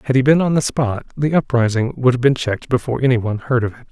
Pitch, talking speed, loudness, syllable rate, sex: 125 Hz, 275 wpm, -17 LUFS, 6.9 syllables/s, male